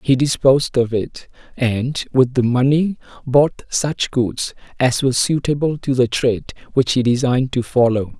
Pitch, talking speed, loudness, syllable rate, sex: 130 Hz, 160 wpm, -18 LUFS, 4.6 syllables/s, male